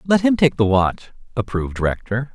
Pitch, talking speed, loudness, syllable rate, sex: 125 Hz, 180 wpm, -19 LUFS, 5.4 syllables/s, male